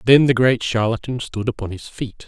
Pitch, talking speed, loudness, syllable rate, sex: 115 Hz, 210 wpm, -20 LUFS, 5.1 syllables/s, male